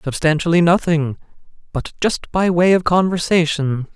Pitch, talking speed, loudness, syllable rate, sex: 165 Hz, 105 wpm, -17 LUFS, 4.7 syllables/s, male